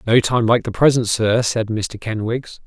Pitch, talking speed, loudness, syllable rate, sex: 115 Hz, 200 wpm, -18 LUFS, 4.4 syllables/s, male